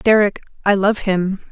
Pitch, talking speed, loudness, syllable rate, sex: 200 Hz, 120 wpm, -17 LUFS, 4.2 syllables/s, female